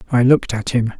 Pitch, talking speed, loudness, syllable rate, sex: 120 Hz, 240 wpm, -17 LUFS, 6.9 syllables/s, male